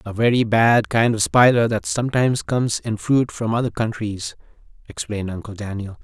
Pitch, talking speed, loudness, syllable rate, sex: 110 Hz, 170 wpm, -20 LUFS, 5.4 syllables/s, male